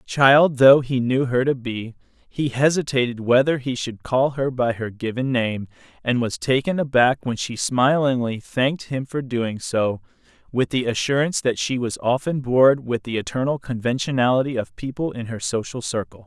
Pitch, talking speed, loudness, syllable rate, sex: 125 Hz, 175 wpm, -21 LUFS, 4.9 syllables/s, male